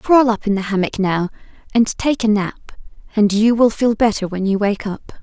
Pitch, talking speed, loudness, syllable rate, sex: 215 Hz, 220 wpm, -17 LUFS, 4.9 syllables/s, female